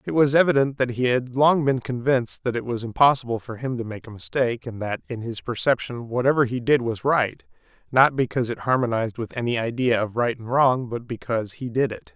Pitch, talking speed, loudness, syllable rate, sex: 125 Hz, 220 wpm, -23 LUFS, 5.8 syllables/s, male